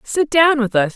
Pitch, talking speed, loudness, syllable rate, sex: 260 Hz, 250 wpm, -15 LUFS, 4.7 syllables/s, female